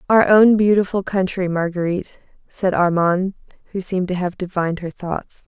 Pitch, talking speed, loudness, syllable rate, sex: 185 Hz, 150 wpm, -19 LUFS, 5.2 syllables/s, female